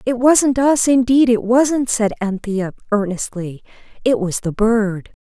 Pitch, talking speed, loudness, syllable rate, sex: 225 Hz, 150 wpm, -17 LUFS, 3.9 syllables/s, female